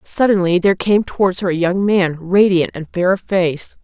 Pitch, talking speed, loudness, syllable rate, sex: 185 Hz, 205 wpm, -16 LUFS, 4.9 syllables/s, female